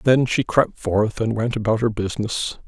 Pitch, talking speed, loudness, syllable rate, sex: 110 Hz, 200 wpm, -21 LUFS, 4.8 syllables/s, male